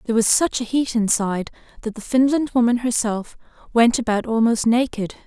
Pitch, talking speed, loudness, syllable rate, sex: 230 Hz, 170 wpm, -19 LUFS, 5.5 syllables/s, female